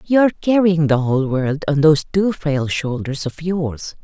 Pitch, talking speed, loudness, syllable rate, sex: 155 Hz, 195 wpm, -18 LUFS, 4.9 syllables/s, female